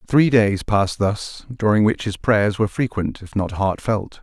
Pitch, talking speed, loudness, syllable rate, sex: 105 Hz, 185 wpm, -20 LUFS, 4.5 syllables/s, male